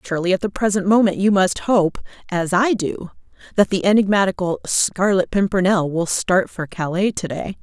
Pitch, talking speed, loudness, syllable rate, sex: 190 Hz, 175 wpm, -19 LUFS, 5.1 syllables/s, female